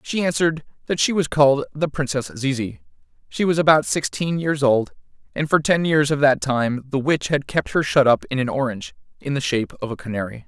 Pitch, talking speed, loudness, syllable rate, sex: 140 Hz, 220 wpm, -20 LUFS, 5.7 syllables/s, male